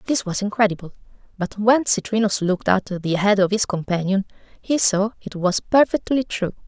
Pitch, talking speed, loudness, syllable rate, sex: 205 Hz, 170 wpm, -20 LUFS, 5.3 syllables/s, female